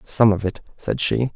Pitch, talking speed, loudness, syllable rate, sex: 110 Hz, 220 wpm, -21 LUFS, 4.5 syllables/s, male